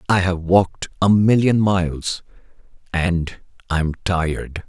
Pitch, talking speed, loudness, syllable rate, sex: 90 Hz, 115 wpm, -19 LUFS, 3.8 syllables/s, male